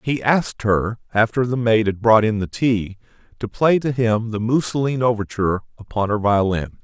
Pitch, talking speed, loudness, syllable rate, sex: 110 Hz, 185 wpm, -19 LUFS, 5.0 syllables/s, male